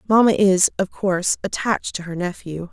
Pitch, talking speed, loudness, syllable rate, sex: 190 Hz, 175 wpm, -20 LUFS, 5.4 syllables/s, female